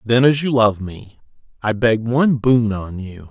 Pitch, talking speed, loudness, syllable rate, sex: 115 Hz, 200 wpm, -17 LUFS, 4.3 syllables/s, male